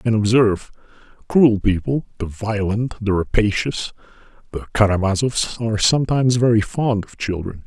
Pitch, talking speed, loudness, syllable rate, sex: 110 Hz, 125 wpm, -19 LUFS, 5.1 syllables/s, male